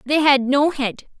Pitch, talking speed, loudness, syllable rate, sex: 275 Hz, 200 wpm, -18 LUFS, 4.4 syllables/s, female